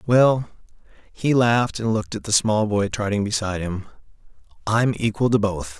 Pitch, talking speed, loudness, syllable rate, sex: 105 Hz, 155 wpm, -21 LUFS, 5.5 syllables/s, male